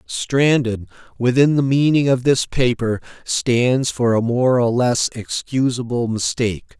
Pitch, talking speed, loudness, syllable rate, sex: 125 Hz, 130 wpm, -18 LUFS, 4.0 syllables/s, male